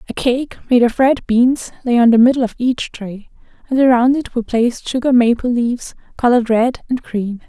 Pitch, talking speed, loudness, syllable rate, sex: 245 Hz, 200 wpm, -15 LUFS, 5.4 syllables/s, female